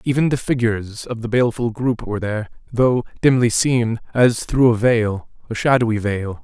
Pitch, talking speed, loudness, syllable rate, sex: 115 Hz, 170 wpm, -19 LUFS, 5.2 syllables/s, male